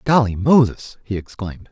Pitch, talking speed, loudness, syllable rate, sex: 115 Hz, 140 wpm, -18 LUFS, 5.1 syllables/s, male